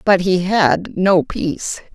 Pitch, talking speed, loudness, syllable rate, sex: 185 Hz, 155 wpm, -17 LUFS, 3.6 syllables/s, female